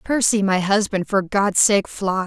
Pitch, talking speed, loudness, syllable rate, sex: 200 Hz, 185 wpm, -19 LUFS, 4.2 syllables/s, female